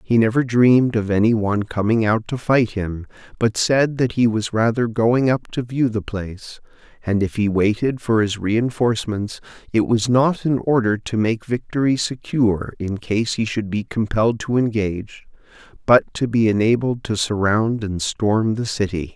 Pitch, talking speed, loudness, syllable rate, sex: 110 Hz, 180 wpm, -19 LUFS, 4.7 syllables/s, male